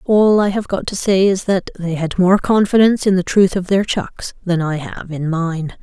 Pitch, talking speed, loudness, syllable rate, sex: 185 Hz, 235 wpm, -16 LUFS, 4.7 syllables/s, female